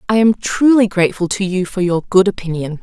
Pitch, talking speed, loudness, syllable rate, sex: 190 Hz, 210 wpm, -15 LUFS, 5.8 syllables/s, female